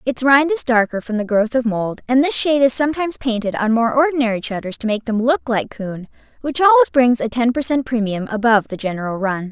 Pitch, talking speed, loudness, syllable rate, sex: 240 Hz, 225 wpm, -17 LUFS, 6.1 syllables/s, female